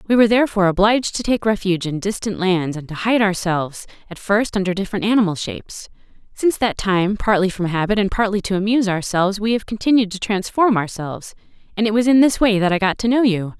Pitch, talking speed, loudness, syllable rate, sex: 200 Hz, 215 wpm, -18 LUFS, 6.4 syllables/s, female